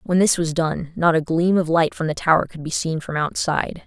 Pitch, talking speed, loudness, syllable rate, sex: 165 Hz, 265 wpm, -20 LUFS, 5.4 syllables/s, female